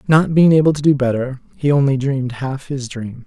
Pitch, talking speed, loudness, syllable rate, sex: 135 Hz, 220 wpm, -17 LUFS, 5.4 syllables/s, male